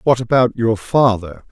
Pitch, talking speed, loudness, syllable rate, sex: 115 Hz, 160 wpm, -16 LUFS, 4.4 syllables/s, male